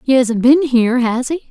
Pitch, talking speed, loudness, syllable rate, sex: 255 Hz, 240 wpm, -14 LUFS, 5.0 syllables/s, female